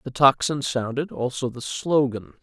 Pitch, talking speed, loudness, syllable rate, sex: 135 Hz, 150 wpm, -23 LUFS, 4.4 syllables/s, male